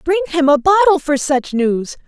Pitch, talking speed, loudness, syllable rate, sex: 315 Hz, 205 wpm, -15 LUFS, 4.4 syllables/s, female